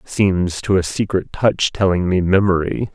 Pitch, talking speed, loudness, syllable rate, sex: 95 Hz, 165 wpm, -18 LUFS, 4.3 syllables/s, male